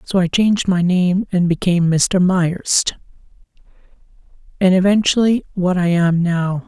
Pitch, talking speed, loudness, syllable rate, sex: 180 Hz, 135 wpm, -16 LUFS, 4.4 syllables/s, male